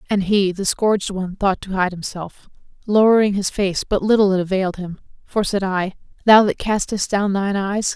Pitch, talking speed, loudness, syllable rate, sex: 195 Hz, 195 wpm, -19 LUFS, 5.3 syllables/s, female